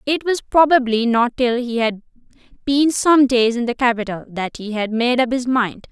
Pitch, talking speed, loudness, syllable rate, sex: 245 Hz, 205 wpm, -18 LUFS, 4.8 syllables/s, female